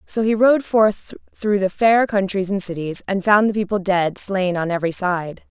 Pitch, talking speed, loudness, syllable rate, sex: 195 Hz, 205 wpm, -19 LUFS, 4.7 syllables/s, female